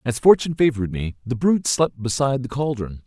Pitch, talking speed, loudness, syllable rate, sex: 130 Hz, 195 wpm, -21 LUFS, 6.3 syllables/s, male